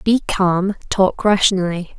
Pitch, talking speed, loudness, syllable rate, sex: 190 Hz, 120 wpm, -17 LUFS, 4.0 syllables/s, female